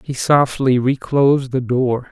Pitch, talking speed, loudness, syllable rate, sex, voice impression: 130 Hz, 140 wpm, -16 LUFS, 4.0 syllables/s, male, masculine, adult-like, tensed, powerful, bright, halting, slightly raspy, mature, friendly, wild, lively, slightly intense, slightly sharp